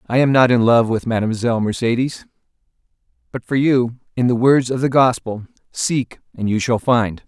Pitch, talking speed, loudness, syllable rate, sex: 125 Hz, 175 wpm, -17 LUFS, 5.3 syllables/s, male